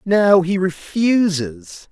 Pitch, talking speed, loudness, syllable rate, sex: 180 Hz, 95 wpm, -17 LUFS, 2.8 syllables/s, male